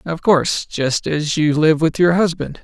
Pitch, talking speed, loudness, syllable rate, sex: 160 Hz, 180 wpm, -17 LUFS, 4.4 syllables/s, male